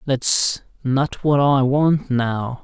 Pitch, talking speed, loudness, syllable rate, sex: 135 Hz, 135 wpm, -19 LUFS, 2.6 syllables/s, male